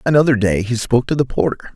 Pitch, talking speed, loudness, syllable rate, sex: 125 Hz, 240 wpm, -17 LUFS, 6.7 syllables/s, male